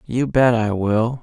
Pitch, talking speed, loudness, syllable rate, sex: 115 Hz, 195 wpm, -18 LUFS, 3.5 syllables/s, male